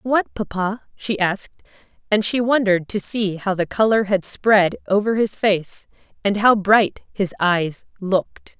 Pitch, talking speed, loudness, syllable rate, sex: 200 Hz, 160 wpm, -19 LUFS, 4.2 syllables/s, female